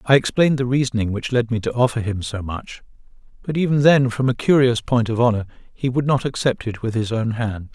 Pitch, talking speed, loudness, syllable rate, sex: 120 Hz, 235 wpm, -20 LUFS, 5.7 syllables/s, male